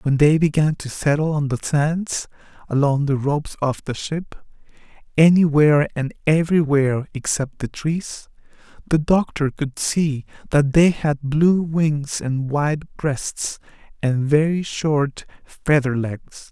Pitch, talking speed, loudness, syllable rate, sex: 145 Hz, 125 wpm, -20 LUFS, 4.0 syllables/s, male